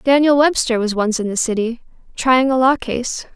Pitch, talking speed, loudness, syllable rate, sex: 250 Hz, 195 wpm, -17 LUFS, 5.0 syllables/s, female